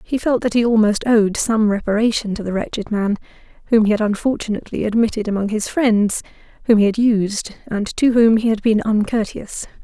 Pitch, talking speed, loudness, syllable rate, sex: 215 Hz, 185 wpm, -18 LUFS, 5.4 syllables/s, female